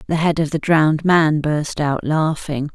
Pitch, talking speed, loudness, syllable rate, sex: 155 Hz, 195 wpm, -18 LUFS, 4.4 syllables/s, female